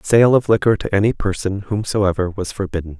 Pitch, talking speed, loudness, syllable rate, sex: 100 Hz, 180 wpm, -18 LUFS, 5.5 syllables/s, male